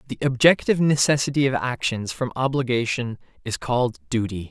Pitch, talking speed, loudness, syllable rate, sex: 125 Hz, 135 wpm, -22 LUFS, 5.7 syllables/s, male